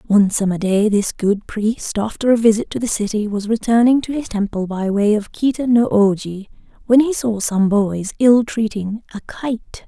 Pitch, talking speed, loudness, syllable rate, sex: 215 Hz, 195 wpm, -17 LUFS, 4.7 syllables/s, female